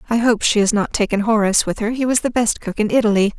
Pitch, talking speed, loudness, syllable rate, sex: 220 Hz, 285 wpm, -17 LUFS, 6.6 syllables/s, female